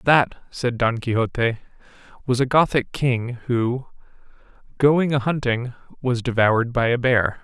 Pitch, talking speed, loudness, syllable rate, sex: 125 Hz, 135 wpm, -21 LUFS, 4.3 syllables/s, male